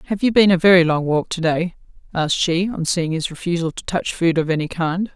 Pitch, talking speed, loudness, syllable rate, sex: 170 Hz, 245 wpm, -19 LUFS, 5.7 syllables/s, female